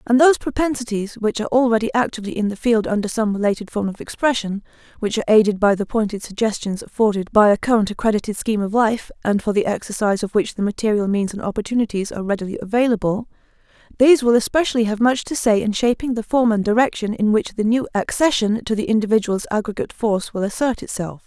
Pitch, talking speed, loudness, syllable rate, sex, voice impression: 220 Hz, 195 wpm, -19 LUFS, 6.7 syllables/s, female, feminine, adult-like, tensed, powerful, hard, clear, slightly raspy, intellectual, calm, elegant, strict, sharp